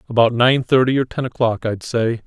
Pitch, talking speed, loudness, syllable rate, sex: 120 Hz, 210 wpm, -18 LUFS, 5.3 syllables/s, male